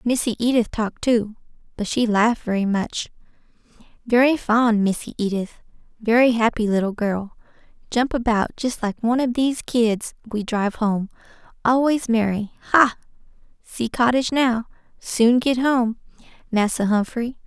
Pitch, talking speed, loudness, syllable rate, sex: 230 Hz, 135 wpm, -21 LUFS, 4.7 syllables/s, female